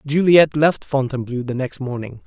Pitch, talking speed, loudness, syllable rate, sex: 135 Hz, 160 wpm, -18 LUFS, 5.6 syllables/s, male